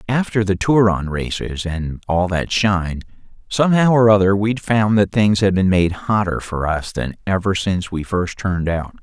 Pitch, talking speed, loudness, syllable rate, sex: 100 Hz, 185 wpm, -18 LUFS, 4.7 syllables/s, male